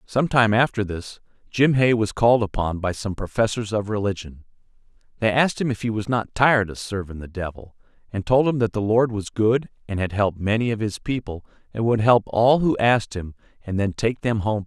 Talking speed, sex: 220 wpm, male